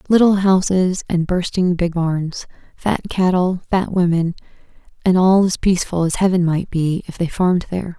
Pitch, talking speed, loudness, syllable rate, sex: 180 Hz, 165 wpm, -18 LUFS, 4.8 syllables/s, female